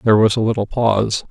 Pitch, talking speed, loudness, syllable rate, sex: 110 Hz, 230 wpm, -17 LUFS, 7.0 syllables/s, male